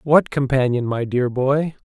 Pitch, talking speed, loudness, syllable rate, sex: 135 Hz, 160 wpm, -19 LUFS, 4.2 syllables/s, male